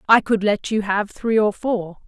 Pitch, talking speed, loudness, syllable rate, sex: 210 Hz, 230 wpm, -20 LUFS, 4.4 syllables/s, female